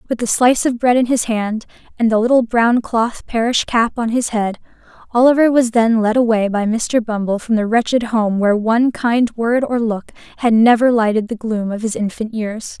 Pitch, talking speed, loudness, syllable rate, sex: 230 Hz, 210 wpm, -16 LUFS, 5.1 syllables/s, female